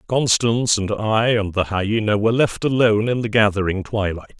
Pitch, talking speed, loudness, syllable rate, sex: 110 Hz, 180 wpm, -19 LUFS, 5.4 syllables/s, male